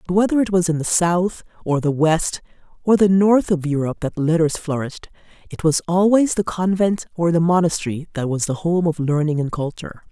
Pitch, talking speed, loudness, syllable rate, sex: 170 Hz, 200 wpm, -19 LUFS, 5.5 syllables/s, female